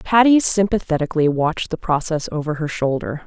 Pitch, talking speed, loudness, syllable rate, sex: 165 Hz, 145 wpm, -19 LUFS, 5.7 syllables/s, female